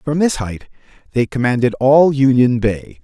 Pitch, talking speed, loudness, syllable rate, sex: 125 Hz, 160 wpm, -15 LUFS, 4.4 syllables/s, male